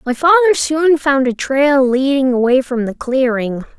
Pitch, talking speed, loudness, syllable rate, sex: 270 Hz, 175 wpm, -14 LUFS, 4.2 syllables/s, female